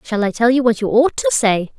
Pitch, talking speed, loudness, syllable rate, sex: 240 Hz, 305 wpm, -16 LUFS, 5.8 syllables/s, female